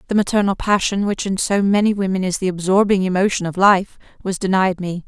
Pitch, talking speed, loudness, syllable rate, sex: 190 Hz, 200 wpm, -18 LUFS, 5.8 syllables/s, female